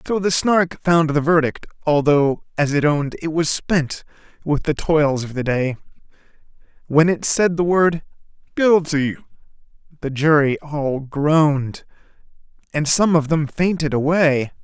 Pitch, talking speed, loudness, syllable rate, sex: 155 Hz, 145 wpm, -18 LUFS, 4.2 syllables/s, male